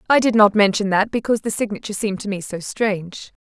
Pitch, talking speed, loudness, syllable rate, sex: 205 Hz, 225 wpm, -19 LUFS, 6.6 syllables/s, female